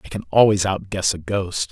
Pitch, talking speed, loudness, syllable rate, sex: 95 Hz, 210 wpm, -20 LUFS, 5.3 syllables/s, male